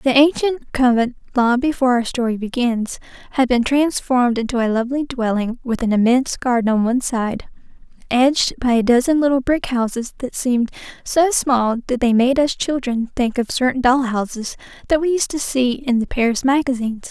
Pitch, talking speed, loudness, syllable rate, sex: 250 Hz, 180 wpm, -18 LUFS, 5.4 syllables/s, female